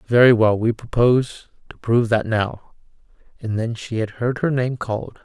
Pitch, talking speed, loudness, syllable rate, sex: 115 Hz, 185 wpm, -20 LUFS, 4.9 syllables/s, male